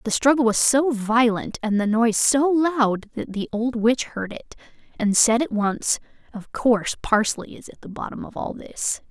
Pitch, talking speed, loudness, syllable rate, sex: 235 Hz, 200 wpm, -21 LUFS, 4.5 syllables/s, female